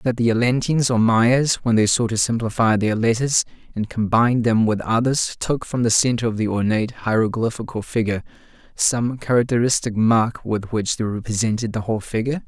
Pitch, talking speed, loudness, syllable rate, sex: 115 Hz, 175 wpm, -20 LUFS, 5.5 syllables/s, male